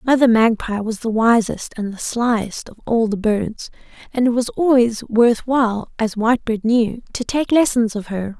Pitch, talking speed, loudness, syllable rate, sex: 230 Hz, 185 wpm, -18 LUFS, 4.5 syllables/s, female